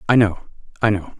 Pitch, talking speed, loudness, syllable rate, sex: 105 Hz, 150 wpm, -19 LUFS, 6.3 syllables/s, male